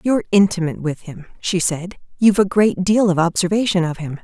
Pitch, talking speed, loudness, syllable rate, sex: 185 Hz, 200 wpm, -18 LUFS, 6.0 syllables/s, female